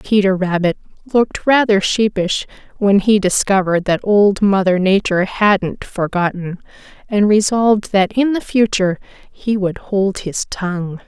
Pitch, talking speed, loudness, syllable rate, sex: 200 Hz, 140 wpm, -16 LUFS, 4.5 syllables/s, female